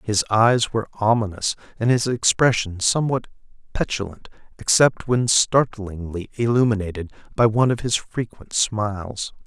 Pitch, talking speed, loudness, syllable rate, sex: 110 Hz, 120 wpm, -21 LUFS, 4.8 syllables/s, male